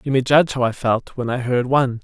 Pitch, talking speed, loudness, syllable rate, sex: 125 Hz, 295 wpm, -19 LUFS, 6.2 syllables/s, male